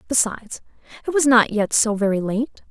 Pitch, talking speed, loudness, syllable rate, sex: 225 Hz, 180 wpm, -19 LUFS, 5.4 syllables/s, female